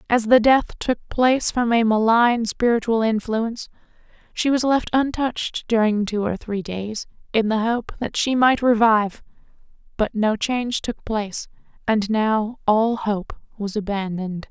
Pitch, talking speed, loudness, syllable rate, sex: 225 Hz, 155 wpm, -21 LUFS, 4.4 syllables/s, female